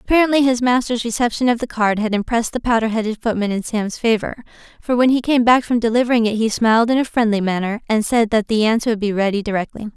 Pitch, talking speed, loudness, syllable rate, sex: 225 Hz, 235 wpm, -18 LUFS, 6.6 syllables/s, female